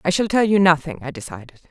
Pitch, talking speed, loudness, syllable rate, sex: 165 Hz, 245 wpm, -17 LUFS, 7.0 syllables/s, female